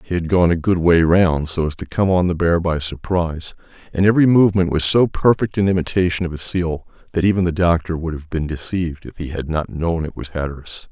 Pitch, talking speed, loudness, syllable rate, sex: 85 Hz, 235 wpm, -18 LUFS, 5.8 syllables/s, male